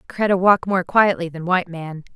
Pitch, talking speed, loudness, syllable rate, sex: 180 Hz, 195 wpm, -18 LUFS, 5.2 syllables/s, female